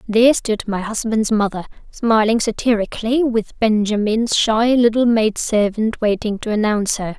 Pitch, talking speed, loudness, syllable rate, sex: 220 Hz, 140 wpm, -17 LUFS, 4.8 syllables/s, female